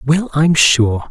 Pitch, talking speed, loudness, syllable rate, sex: 145 Hz, 165 wpm, -13 LUFS, 3.0 syllables/s, male